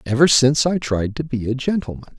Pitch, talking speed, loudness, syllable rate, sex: 130 Hz, 220 wpm, -18 LUFS, 6.2 syllables/s, male